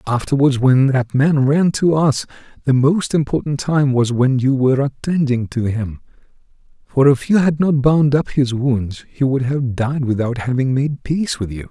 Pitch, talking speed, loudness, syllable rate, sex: 135 Hz, 190 wpm, -17 LUFS, 4.6 syllables/s, male